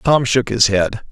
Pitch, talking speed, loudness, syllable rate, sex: 115 Hz, 215 wpm, -15 LUFS, 4.4 syllables/s, male